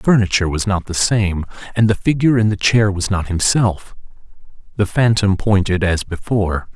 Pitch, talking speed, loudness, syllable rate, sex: 100 Hz, 180 wpm, -17 LUFS, 5.4 syllables/s, male